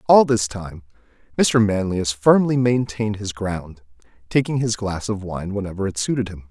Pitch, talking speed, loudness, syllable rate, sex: 105 Hz, 165 wpm, -20 LUFS, 4.9 syllables/s, male